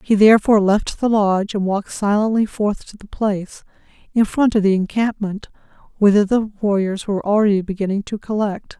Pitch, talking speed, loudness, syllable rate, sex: 205 Hz, 170 wpm, -18 LUFS, 5.6 syllables/s, female